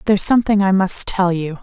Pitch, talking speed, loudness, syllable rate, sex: 190 Hz, 220 wpm, -15 LUFS, 6.0 syllables/s, female